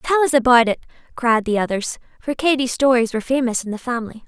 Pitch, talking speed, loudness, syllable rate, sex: 245 Hz, 210 wpm, -19 LUFS, 6.2 syllables/s, female